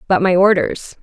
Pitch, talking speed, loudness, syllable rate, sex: 185 Hz, 175 wpm, -15 LUFS, 4.8 syllables/s, female